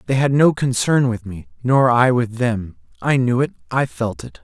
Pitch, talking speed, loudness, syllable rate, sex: 125 Hz, 215 wpm, -18 LUFS, 4.6 syllables/s, male